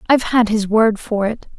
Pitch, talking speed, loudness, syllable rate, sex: 220 Hz, 225 wpm, -17 LUFS, 5.2 syllables/s, female